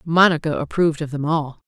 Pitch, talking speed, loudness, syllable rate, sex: 155 Hz, 180 wpm, -20 LUFS, 5.9 syllables/s, female